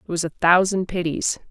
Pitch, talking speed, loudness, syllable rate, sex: 175 Hz, 200 wpm, -20 LUFS, 5.3 syllables/s, female